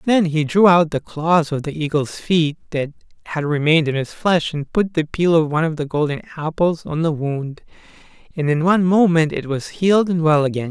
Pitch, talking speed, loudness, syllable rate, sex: 160 Hz, 220 wpm, -18 LUFS, 5.3 syllables/s, male